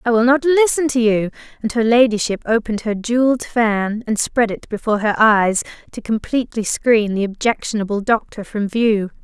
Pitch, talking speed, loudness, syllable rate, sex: 225 Hz, 175 wpm, -17 LUFS, 5.4 syllables/s, female